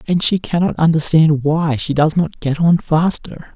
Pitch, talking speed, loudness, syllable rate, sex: 160 Hz, 205 wpm, -15 LUFS, 4.4 syllables/s, male